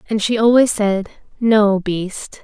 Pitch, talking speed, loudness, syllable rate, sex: 210 Hz, 150 wpm, -16 LUFS, 3.7 syllables/s, female